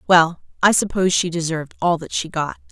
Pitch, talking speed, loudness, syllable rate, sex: 170 Hz, 200 wpm, -19 LUFS, 6.0 syllables/s, female